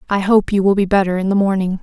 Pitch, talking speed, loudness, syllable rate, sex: 195 Hz, 295 wpm, -15 LUFS, 6.7 syllables/s, female